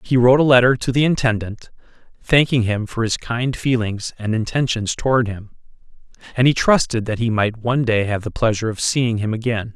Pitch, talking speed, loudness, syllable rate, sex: 115 Hz, 195 wpm, -18 LUFS, 5.5 syllables/s, male